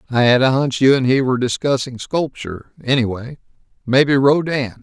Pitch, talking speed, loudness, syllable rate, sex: 130 Hz, 160 wpm, -17 LUFS, 5.5 syllables/s, male